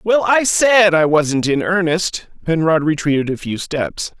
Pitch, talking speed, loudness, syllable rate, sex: 170 Hz, 170 wpm, -16 LUFS, 4.1 syllables/s, male